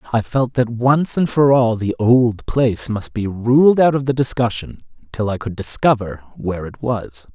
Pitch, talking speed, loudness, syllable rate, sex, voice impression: 120 Hz, 195 wpm, -17 LUFS, 4.6 syllables/s, male, masculine, adult-like, tensed, powerful, bright, raspy, friendly, wild, lively, intense